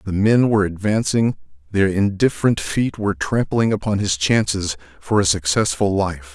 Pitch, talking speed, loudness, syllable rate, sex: 95 Hz, 160 wpm, -19 LUFS, 5.0 syllables/s, male